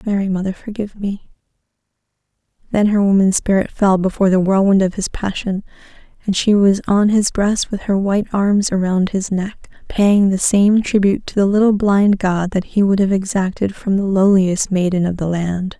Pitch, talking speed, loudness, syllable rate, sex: 195 Hz, 185 wpm, -16 LUFS, 5.1 syllables/s, female